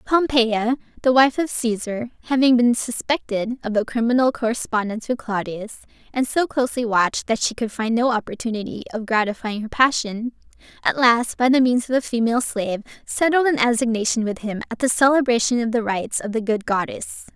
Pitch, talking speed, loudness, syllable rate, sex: 235 Hz, 180 wpm, -21 LUFS, 5.6 syllables/s, female